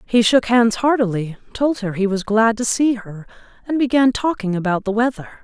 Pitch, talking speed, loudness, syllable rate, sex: 225 Hz, 200 wpm, -18 LUFS, 5.0 syllables/s, female